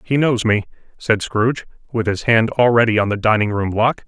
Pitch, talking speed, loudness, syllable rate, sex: 110 Hz, 205 wpm, -17 LUFS, 5.4 syllables/s, male